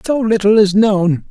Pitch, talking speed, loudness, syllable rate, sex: 205 Hz, 185 wpm, -13 LUFS, 4.3 syllables/s, male